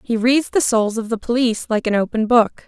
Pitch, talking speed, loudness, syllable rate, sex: 230 Hz, 245 wpm, -18 LUFS, 5.5 syllables/s, female